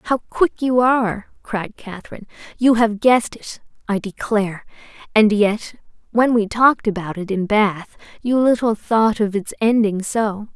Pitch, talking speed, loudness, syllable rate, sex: 220 Hz, 160 wpm, -18 LUFS, 4.5 syllables/s, female